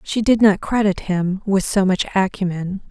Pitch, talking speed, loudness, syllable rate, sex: 195 Hz, 185 wpm, -18 LUFS, 4.6 syllables/s, female